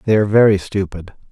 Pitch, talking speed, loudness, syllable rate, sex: 100 Hz, 185 wpm, -15 LUFS, 6.7 syllables/s, male